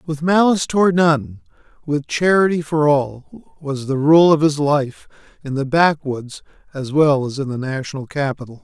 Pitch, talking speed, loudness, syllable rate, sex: 150 Hz, 165 wpm, -17 LUFS, 4.7 syllables/s, male